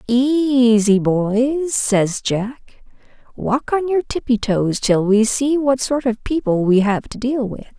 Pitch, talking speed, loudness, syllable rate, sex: 240 Hz, 160 wpm, -17 LUFS, 3.4 syllables/s, female